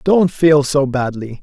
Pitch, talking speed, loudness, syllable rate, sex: 145 Hz, 170 wpm, -15 LUFS, 3.8 syllables/s, male